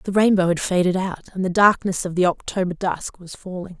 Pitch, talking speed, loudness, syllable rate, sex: 185 Hz, 220 wpm, -20 LUFS, 5.7 syllables/s, female